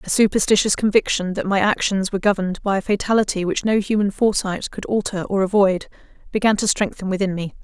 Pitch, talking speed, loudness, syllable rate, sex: 200 Hz, 190 wpm, -20 LUFS, 6.3 syllables/s, female